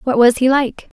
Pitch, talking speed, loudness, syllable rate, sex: 260 Hz, 245 wpm, -15 LUFS, 5.1 syllables/s, female